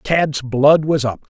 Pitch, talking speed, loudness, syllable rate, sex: 140 Hz, 175 wpm, -16 LUFS, 3.2 syllables/s, male